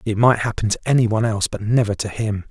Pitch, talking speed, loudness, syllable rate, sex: 110 Hz, 265 wpm, -19 LUFS, 6.8 syllables/s, male